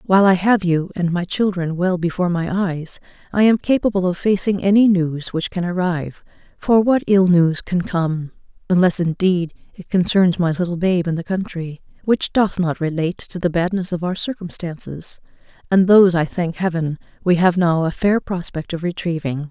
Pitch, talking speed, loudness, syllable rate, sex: 180 Hz, 185 wpm, -18 LUFS, 4.4 syllables/s, female